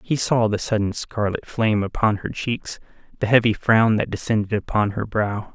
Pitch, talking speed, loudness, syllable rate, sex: 110 Hz, 185 wpm, -21 LUFS, 5.0 syllables/s, male